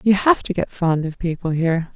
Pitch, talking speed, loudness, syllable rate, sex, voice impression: 175 Hz, 245 wpm, -20 LUFS, 5.4 syllables/s, female, feminine, adult-like, slightly powerful, soft, fluent, intellectual, calm, friendly, reassuring, elegant, lively, kind